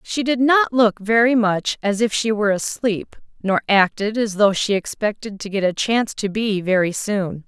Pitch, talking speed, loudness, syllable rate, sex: 210 Hz, 200 wpm, -19 LUFS, 4.7 syllables/s, female